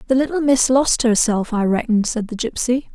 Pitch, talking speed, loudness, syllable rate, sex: 240 Hz, 205 wpm, -18 LUFS, 5.2 syllables/s, female